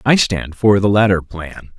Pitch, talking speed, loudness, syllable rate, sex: 95 Hz, 200 wpm, -15 LUFS, 4.3 syllables/s, male